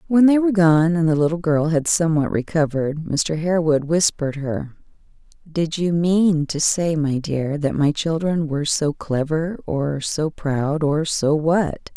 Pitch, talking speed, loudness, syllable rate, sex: 160 Hz, 165 wpm, -20 LUFS, 4.4 syllables/s, female